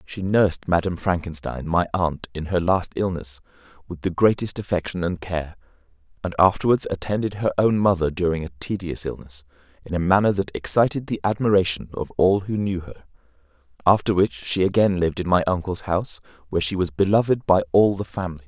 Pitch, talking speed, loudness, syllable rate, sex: 90 Hz, 180 wpm, -22 LUFS, 5.8 syllables/s, male